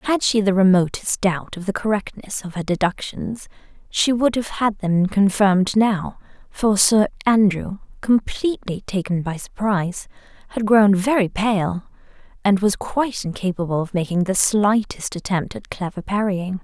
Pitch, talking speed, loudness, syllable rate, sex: 200 Hz, 150 wpm, -20 LUFS, 4.6 syllables/s, female